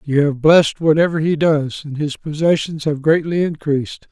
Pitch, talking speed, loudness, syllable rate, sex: 155 Hz, 175 wpm, -17 LUFS, 5.0 syllables/s, male